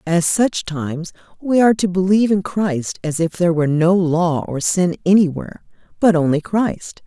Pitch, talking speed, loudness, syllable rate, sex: 175 Hz, 180 wpm, -17 LUFS, 5.0 syllables/s, female